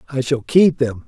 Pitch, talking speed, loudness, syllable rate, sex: 135 Hz, 225 wpm, -17 LUFS, 4.8 syllables/s, male